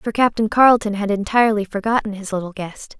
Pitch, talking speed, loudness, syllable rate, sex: 210 Hz, 180 wpm, -18 LUFS, 6.1 syllables/s, female